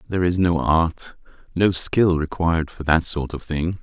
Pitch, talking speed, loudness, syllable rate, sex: 85 Hz, 190 wpm, -21 LUFS, 4.6 syllables/s, male